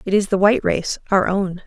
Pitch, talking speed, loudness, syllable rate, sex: 195 Hz, 250 wpm, -18 LUFS, 5.7 syllables/s, female